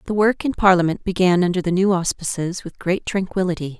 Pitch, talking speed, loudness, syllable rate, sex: 185 Hz, 190 wpm, -20 LUFS, 5.8 syllables/s, female